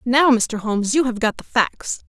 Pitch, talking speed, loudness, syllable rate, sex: 235 Hz, 225 wpm, -19 LUFS, 4.7 syllables/s, female